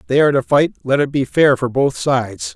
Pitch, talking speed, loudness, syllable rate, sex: 135 Hz, 280 wpm, -16 LUFS, 5.9 syllables/s, male